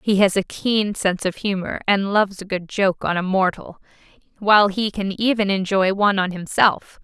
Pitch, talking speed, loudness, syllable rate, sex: 195 Hz, 195 wpm, -20 LUFS, 5.1 syllables/s, female